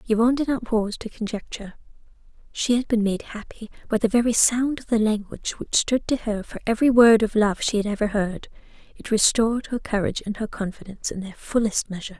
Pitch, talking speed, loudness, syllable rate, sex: 220 Hz, 205 wpm, -22 LUFS, 6.2 syllables/s, female